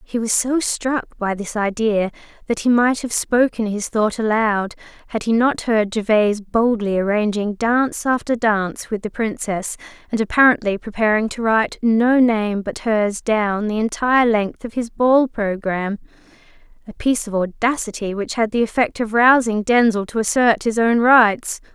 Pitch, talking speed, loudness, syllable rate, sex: 220 Hz, 165 wpm, -18 LUFS, 4.7 syllables/s, female